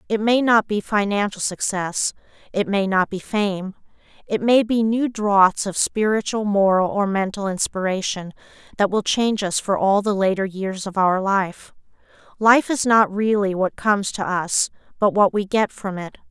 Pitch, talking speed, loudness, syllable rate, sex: 200 Hz, 175 wpm, -20 LUFS, 4.5 syllables/s, female